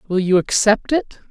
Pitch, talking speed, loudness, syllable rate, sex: 210 Hz, 185 wpm, -17 LUFS, 4.2 syllables/s, female